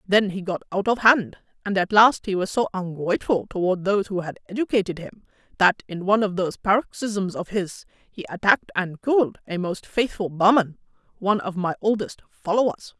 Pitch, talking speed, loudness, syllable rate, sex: 195 Hz, 185 wpm, -22 LUFS, 5.7 syllables/s, female